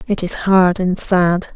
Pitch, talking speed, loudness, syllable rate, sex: 185 Hz, 190 wpm, -16 LUFS, 3.6 syllables/s, female